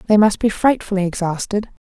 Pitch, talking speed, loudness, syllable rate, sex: 200 Hz, 160 wpm, -18 LUFS, 5.7 syllables/s, female